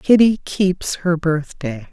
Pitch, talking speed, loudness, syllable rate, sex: 170 Hz, 125 wpm, -18 LUFS, 3.3 syllables/s, female